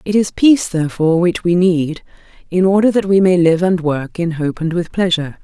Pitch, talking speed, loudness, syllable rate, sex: 175 Hz, 220 wpm, -15 LUFS, 5.6 syllables/s, female